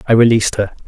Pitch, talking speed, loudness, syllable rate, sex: 110 Hz, 205 wpm, -14 LUFS, 7.5 syllables/s, male